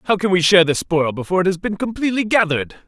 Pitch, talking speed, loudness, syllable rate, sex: 180 Hz, 250 wpm, -17 LUFS, 7.1 syllables/s, male